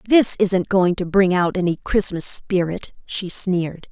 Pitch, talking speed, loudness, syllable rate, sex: 185 Hz, 170 wpm, -19 LUFS, 4.3 syllables/s, female